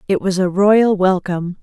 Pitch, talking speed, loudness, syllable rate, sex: 190 Hz, 185 wpm, -15 LUFS, 4.9 syllables/s, female